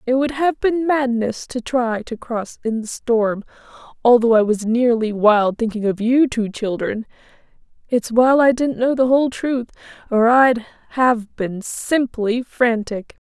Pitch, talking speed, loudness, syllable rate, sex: 240 Hz, 165 wpm, -18 LUFS, 4.1 syllables/s, female